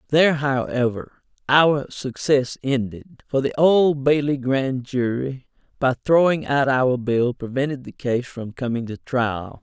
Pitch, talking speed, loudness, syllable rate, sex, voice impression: 130 Hz, 145 wpm, -21 LUFS, 3.9 syllables/s, male, very masculine, very adult-like, very middle-aged, tensed, slightly powerful, bright, hard, slightly muffled, fluent, slightly raspy, cool, slightly intellectual, sincere, very calm, slightly mature, friendly, reassuring, slightly unique, slightly wild, kind, light